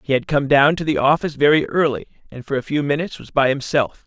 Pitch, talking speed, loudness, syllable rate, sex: 140 Hz, 250 wpm, -18 LUFS, 6.5 syllables/s, male